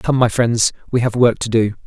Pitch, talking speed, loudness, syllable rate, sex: 115 Hz, 260 wpm, -16 LUFS, 5.1 syllables/s, male